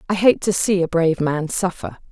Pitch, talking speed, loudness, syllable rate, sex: 180 Hz, 225 wpm, -19 LUFS, 5.5 syllables/s, female